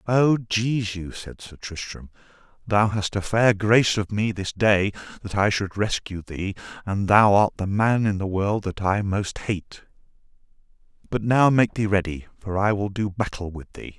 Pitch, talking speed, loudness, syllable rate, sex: 100 Hz, 185 wpm, -23 LUFS, 4.5 syllables/s, male